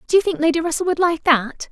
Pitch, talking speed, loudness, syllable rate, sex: 325 Hz, 280 wpm, -18 LUFS, 6.4 syllables/s, female